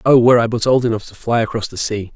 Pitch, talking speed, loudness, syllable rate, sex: 115 Hz, 305 wpm, -16 LUFS, 6.9 syllables/s, male